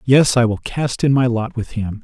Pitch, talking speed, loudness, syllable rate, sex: 120 Hz, 265 wpm, -17 LUFS, 4.7 syllables/s, male